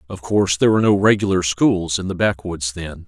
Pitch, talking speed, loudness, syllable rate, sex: 90 Hz, 215 wpm, -18 LUFS, 5.9 syllables/s, male